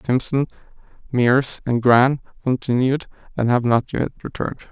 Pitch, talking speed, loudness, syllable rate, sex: 125 Hz, 125 wpm, -20 LUFS, 5.0 syllables/s, male